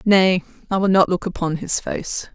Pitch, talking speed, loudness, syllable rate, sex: 185 Hz, 205 wpm, -20 LUFS, 4.6 syllables/s, female